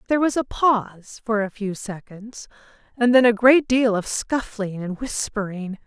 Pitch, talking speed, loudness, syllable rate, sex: 220 Hz, 175 wpm, -21 LUFS, 4.5 syllables/s, female